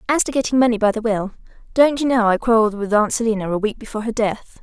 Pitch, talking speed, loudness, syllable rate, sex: 225 Hz, 260 wpm, -18 LUFS, 6.9 syllables/s, female